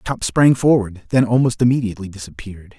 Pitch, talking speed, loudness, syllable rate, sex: 110 Hz, 150 wpm, -17 LUFS, 6.1 syllables/s, male